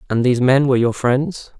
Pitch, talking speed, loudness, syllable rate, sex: 130 Hz, 225 wpm, -17 LUFS, 6.0 syllables/s, male